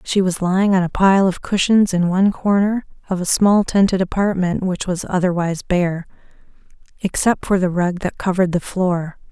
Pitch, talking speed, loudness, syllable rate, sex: 185 Hz, 180 wpm, -18 LUFS, 5.2 syllables/s, female